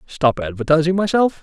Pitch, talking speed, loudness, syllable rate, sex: 160 Hz, 125 wpm, -18 LUFS, 5.4 syllables/s, male